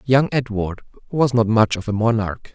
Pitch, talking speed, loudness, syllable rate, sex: 115 Hz, 190 wpm, -20 LUFS, 4.7 syllables/s, male